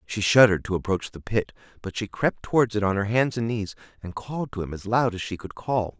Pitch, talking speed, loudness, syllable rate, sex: 105 Hz, 260 wpm, -24 LUFS, 5.8 syllables/s, male